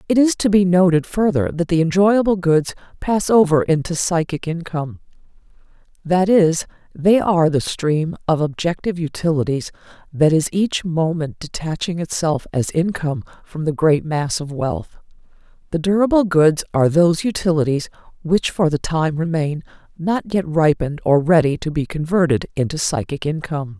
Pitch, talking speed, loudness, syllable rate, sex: 165 Hz, 150 wpm, -18 LUFS, 5.0 syllables/s, female